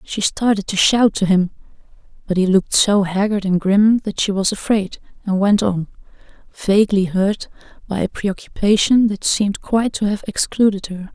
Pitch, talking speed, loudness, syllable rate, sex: 200 Hz, 170 wpm, -17 LUFS, 5.0 syllables/s, female